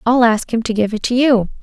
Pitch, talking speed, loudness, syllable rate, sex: 230 Hz, 295 wpm, -16 LUFS, 5.7 syllables/s, female